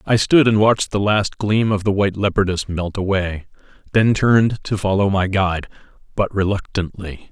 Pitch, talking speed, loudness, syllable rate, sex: 100 Hz, 165 wpm, -18 LUFS, 5.2 syllables/s, male